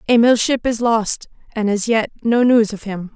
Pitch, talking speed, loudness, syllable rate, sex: 225 Hz, 210 wpm, -17 LUFS, 4.6 syllables/s, female